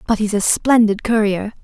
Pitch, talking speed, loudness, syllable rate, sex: 215 Hz, 185 wpm, -16 LUFS, 5.0 syllables/s, female